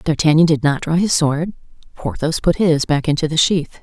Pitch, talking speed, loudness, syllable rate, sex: 160 Hz, 205 wpm, -17 LUFS, 5.1 syllables/s, female